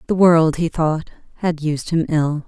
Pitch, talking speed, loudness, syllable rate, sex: 160 Hz, 195 wpm, -18 LUFS, 4.2 syllables/s, female